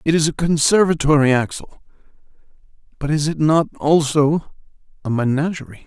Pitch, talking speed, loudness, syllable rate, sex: 150 Hz, 125 wpm, -18 LUFS, 5.1 syllables/s, male